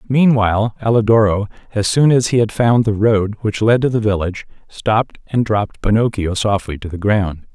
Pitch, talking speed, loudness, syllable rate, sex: 110 Hz, 185 wpm, -16 LUFS, 5.3 syllables/s, male